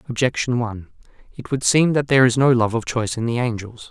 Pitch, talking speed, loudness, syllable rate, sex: 120 Hz, 230 wpm, -19 LUFS, 6.4 syllables/s, male